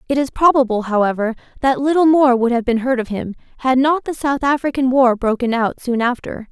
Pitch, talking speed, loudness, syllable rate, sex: 255 Hz, 210 wpm, -17 LUFS, 5.6 syllables/s, female